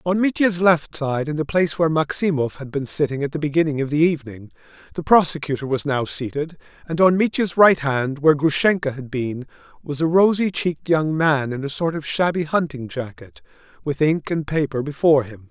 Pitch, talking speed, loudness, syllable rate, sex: 150 Hz, 195 wpm, -20 LUFS, 5.6 syllables/s, male